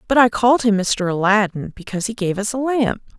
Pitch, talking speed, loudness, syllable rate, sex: 215 Hz, 225 wpm, -18 LUFS, 5.9 syllables/s, female